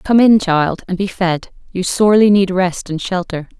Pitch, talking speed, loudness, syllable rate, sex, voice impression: 185 Hz, 200 wpm, -15 LUFS, 4.6 syllables/s, female, feminine, adult-like, slightly fluent, intellectual, slightly calm, slightly sweet